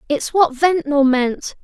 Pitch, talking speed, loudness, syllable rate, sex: 295 Hz, 145 wpm, -17 LUFS, 3.6 syllables/s, female